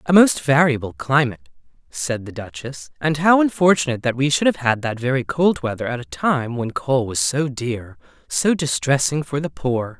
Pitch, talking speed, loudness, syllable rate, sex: 130 Hz, 190 wpm, -20 LUFS, 5.0 syllables/s, male